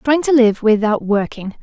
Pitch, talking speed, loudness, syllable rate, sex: 235 Hz, 185 wpm, -15 LUFS, 4.7 syllables/s, female